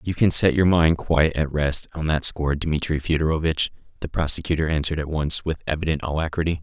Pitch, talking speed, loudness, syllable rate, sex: 80 Hz, 190 wpm, -22 LUFS, 6.1 syllables/s, male